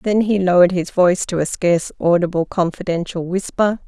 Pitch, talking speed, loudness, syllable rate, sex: 180 Hz, 170 wpm, -18 LUFS, 5.7 syllables/s, female